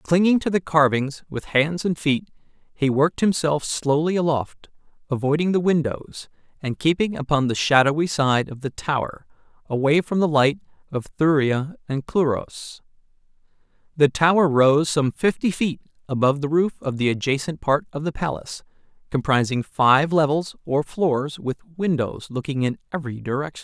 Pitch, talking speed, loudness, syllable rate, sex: 150 Hz, 150 wpm, -22 LUFS, 4.9 syllables/s, male